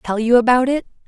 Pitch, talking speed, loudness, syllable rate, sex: 245 Hz, 225 wpm, -16 LUFS, 5.9 syllables/s, female